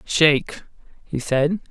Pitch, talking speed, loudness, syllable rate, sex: 150 Hz, 105 wpm, -20 LUFS, 3.5 syllables/s, female